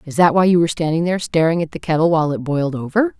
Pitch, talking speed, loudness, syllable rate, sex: 165 Hz, 280 wpm, -17 LUFS, 7.4 syllables/s, female